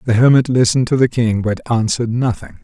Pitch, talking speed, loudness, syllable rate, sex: 115 Hz, 205 wpm, -15 LUFS, 6.3 syllables/s, male